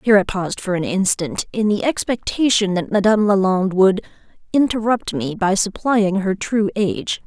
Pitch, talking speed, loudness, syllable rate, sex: 200 Hz, 165 wpm, -18 LUFS, 5.3 syllables/s, female